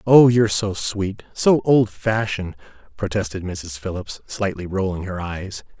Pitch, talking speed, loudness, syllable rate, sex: 100 Hz, 135 wpm, -21 LUFS, 4.4 syllables/s, male